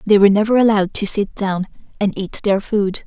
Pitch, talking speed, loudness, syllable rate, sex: 205 Hz, 215 wpm, -17 LUFS, 5.7 syllables/s, female